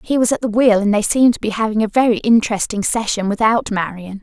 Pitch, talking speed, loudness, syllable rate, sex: 220 Hz, 240 wpm, -16 LUFS, 6.3 syllables/s, female